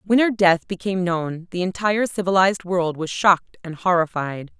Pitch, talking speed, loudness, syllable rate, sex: 180 Hz, 170 wpm, -21 LUFS, 5.3 syllables/s, female